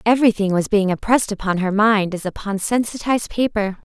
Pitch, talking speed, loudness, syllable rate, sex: 210 Hz, 165 wpm, -19 LUFS, 6.0 syllables/s, female